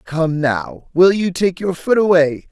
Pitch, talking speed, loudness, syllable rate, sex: 170 Hz, 190 wpm, -16 LUFS, 3.8 syllables/s, male